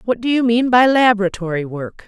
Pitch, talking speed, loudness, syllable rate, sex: 220 Hz, 200 wpm, -15 LUFS, 5.7 syllables/s, female